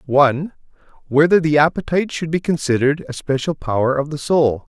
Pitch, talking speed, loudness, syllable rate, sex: 145 Hz, 165 wpm, -18 LUFS, 6.1 syllables/s, male